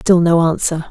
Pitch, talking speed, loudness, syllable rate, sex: 170 Hz, 200 wpm, -14 LUFS, 4.8 syllables/s, female